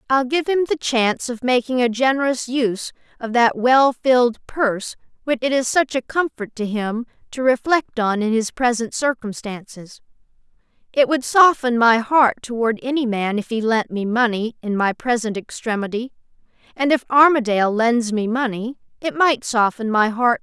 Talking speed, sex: 175 wpm, female